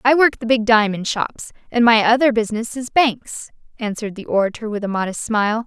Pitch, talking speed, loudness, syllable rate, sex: 225 Hz, 200 wpm, -18 LUFS, 5.7 syllables/s, female